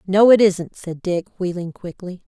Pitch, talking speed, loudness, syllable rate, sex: 185 Hz, 180 wpm, -18 LUFS, 4.3 syllables/s, female